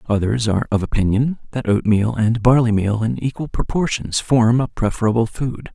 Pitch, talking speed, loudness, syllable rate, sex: 115 Hz, 155 wpm, -19 LUFS, 5.2 syllables/s, male